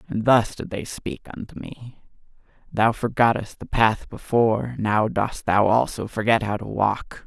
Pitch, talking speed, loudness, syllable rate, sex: 110 Hz, 165 wpm, -22 LUFS, 4.3 syllables/s, male